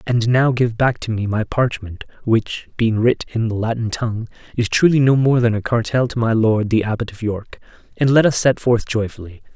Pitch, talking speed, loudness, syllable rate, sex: 115 Hz, 205 wpm, -18 LUFS, 5.2 syllables/s, male